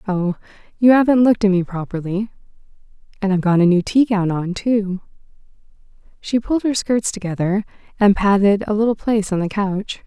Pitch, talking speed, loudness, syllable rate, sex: 205 Hz, 175 wpm, -18 LUFS, 5.7 syllables/s, female